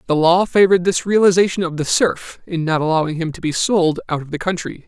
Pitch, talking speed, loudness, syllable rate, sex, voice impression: 170 Hz, 235 wpm, -17 LUFS, 5.9 syllables/s, male, masculine, adult-like, slightly powerful, fluent, slightly refreshing, unique, intense, slightly sharp